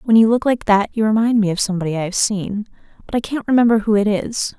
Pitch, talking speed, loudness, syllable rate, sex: 215 Hz, 260 wpm, -17 LUFS, 6.4 syllables/s, female